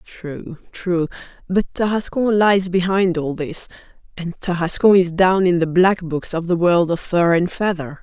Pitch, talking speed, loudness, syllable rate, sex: 180 Hz, 170 wpm, -18 LUFS, 4.3 syllables/s, female